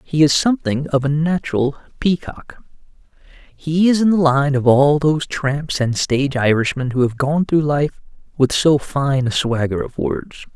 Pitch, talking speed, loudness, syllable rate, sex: 145 Hz, 175 wpm, -17 LUFS, 4.6 syllables/s, male